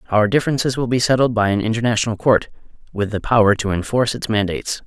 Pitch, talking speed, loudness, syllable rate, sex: 115 Hz, 195 wpm, -18 LUFS, 6.9 syllables/s, male